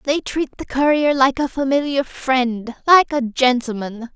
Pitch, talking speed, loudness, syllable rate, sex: 265 Hz, 145 wpm, -18 LUFS, 4.2 syllables/s, female